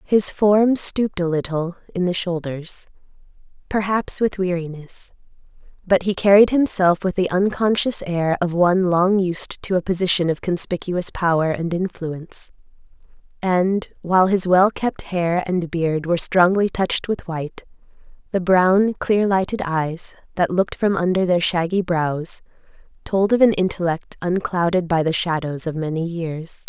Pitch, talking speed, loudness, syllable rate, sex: 180 Hz, 150 wpm, -20 LUFS, 4.5 syllables/s, female